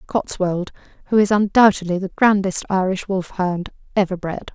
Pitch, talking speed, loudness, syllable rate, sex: 190 Hz, 130 wpm, -19 LUFS, 4.8 syllables/s, female